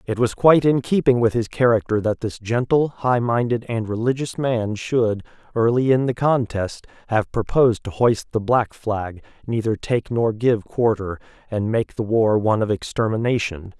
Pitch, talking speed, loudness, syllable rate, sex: 115 Hz, 175 wpm, -20 LUFS, 4.7 syllables/s, male